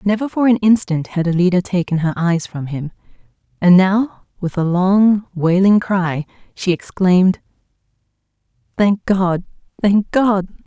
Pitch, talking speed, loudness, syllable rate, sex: 185 Hz, 135 wpm, -16 LUFS, 4.3 syllables/s, female